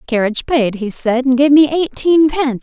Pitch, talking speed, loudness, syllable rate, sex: 265 Hz, 205 wpm, -14 LUFS, 5.2 syllables/s, female